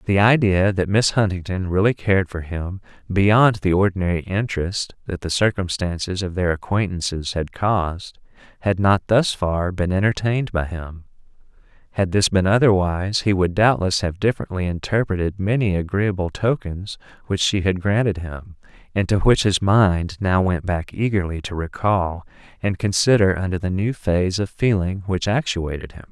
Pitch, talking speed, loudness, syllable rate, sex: 95 Hz, 160 wpm, -20 LUFS, 5.0 syllables/s, male